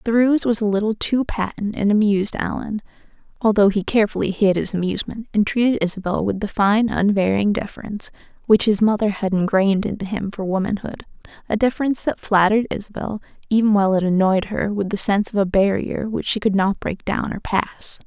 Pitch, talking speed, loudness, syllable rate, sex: 205 Hz, 185 wpm, -20 LUFS, 5.9 syllables/s, female